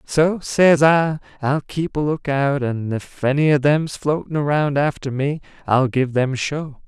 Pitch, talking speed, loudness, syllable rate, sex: 145 Hz, 185 wpm, -19 LUFS, 4.1 syllables/s, male